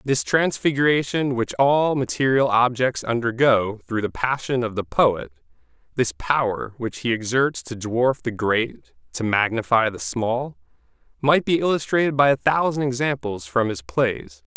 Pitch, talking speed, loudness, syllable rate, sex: 120 Hz, 140 wpm, -21 LUFS, 4.4 syllables/s, male